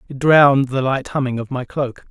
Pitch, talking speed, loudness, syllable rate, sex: 135 Hz, 230 wpm, -17 LUFS, 5.3 syllables/s, male